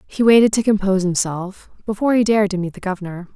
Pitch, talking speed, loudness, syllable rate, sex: 200 Hz, 215 wpm, -18 LUFS, 6.9 syllables/s, female